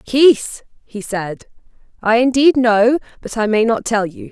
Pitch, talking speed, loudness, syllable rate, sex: 230 Hz, 165 wpm, -15 LUFS, 4.4 syllables/s, female